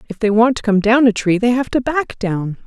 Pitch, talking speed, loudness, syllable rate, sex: 225 Hz, 295 wpm, -16 LUFS, 5.3 syllables/s, female